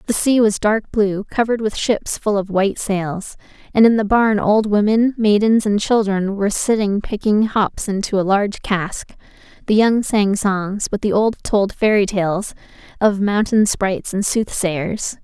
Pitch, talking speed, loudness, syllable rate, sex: 205 Hz, 175 wpm, -17 LUFS, 4.4 syllables/s, female